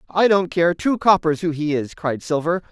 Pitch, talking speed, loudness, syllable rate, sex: 170 Hz, 220 wpm, -19 LUFS, 4.9 syllables/s, male